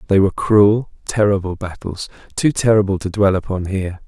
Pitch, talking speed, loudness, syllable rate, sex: 100 Hz, 160 wpm, -17 LUFS, 5.5 syllables/s, male